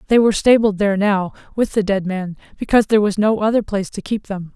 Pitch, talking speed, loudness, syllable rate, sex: 205 Hz, 235 wpm, -17 LUFS, 6.7 syllables/s, female